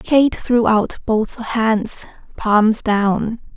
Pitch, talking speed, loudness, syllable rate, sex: 220 Hz, 120 wpm, -17 LUFS, 2.3 syllables/s, female